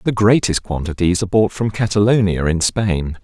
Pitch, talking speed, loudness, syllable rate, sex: 100 Hz, 165 wpm, -17 LUFS, 5.2 syllables/s, male